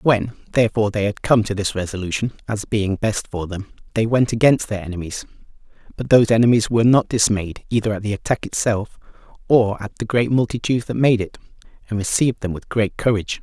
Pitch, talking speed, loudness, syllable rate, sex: 110 Hz, 190 wpm, -19 LUFS, 6.0 syllables/s, male